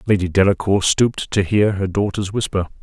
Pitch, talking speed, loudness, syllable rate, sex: 100 Hz, 170 wpm, -18 LUFS, 5.4 syllables/s, male